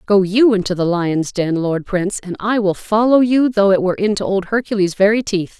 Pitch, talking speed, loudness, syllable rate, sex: 200 Hz, 225 wpm, -16 LUFS, 5.4 syllables/s, female